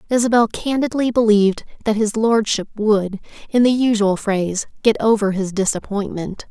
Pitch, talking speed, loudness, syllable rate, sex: 215 Hz, 140 wpm, -18 LUFS, 5.0 syllables/s, female